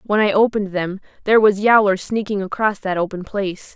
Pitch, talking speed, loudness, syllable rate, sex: 200 Hz, 190 wpm, -18 LUFS, 5.9 syllables/s, female